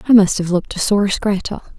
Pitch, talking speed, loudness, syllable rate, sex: 200 Hz, 235 wpm, -17 LUFS, 5.7 syllables/s, female